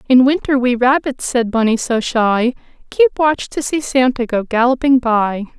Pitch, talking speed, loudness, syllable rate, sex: 250 Hz, 170 wpm, -15 LUFS, 4.5 syllables/s, female